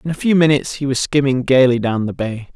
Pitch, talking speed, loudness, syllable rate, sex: 135 Hz, 260 wpm, -16 LUFS, 6.2 syllables/s, male